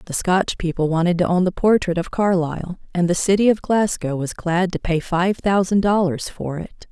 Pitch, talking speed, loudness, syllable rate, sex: 180 Hz, 210 wpm, -20 LUFS, 5.0 syllables/s, female